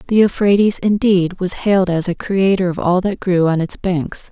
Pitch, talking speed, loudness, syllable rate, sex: 185 Hz, 210 wpm, -16 LUFS, 4.9 syllables/s, female